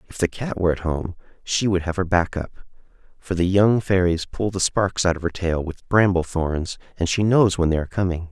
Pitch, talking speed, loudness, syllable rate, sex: 90 Hz, 240 wpm, -21 LUFS, 5.5 syllables/s, male